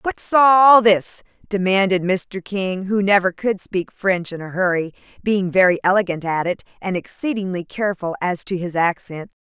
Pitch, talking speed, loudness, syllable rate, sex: 190 Hz, 165 wpm, -19 LUFS, 4.6 syllables/s, female